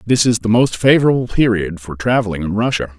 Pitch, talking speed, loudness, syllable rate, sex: 110 Hz, 200 wpm, -16 LUFS, 5.9 syllables/s, male